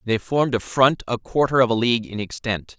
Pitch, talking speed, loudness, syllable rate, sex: 120 Hz, 235 wpm, -21 LUFS, 5.8 syllables/s, male